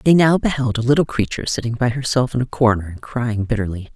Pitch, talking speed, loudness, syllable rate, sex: 120 Hz, 230 wpm, -19 LUFS, 6.3 syllables/s, female